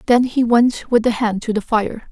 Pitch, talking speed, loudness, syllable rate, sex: 230 Hz, 255 wpm, -17 LUFS, 4.6 syllables/s, female